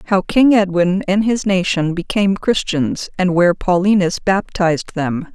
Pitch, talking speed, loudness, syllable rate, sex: 190 Hz, 145 wpm, -16 LUFS, 4.4 syllables/s, female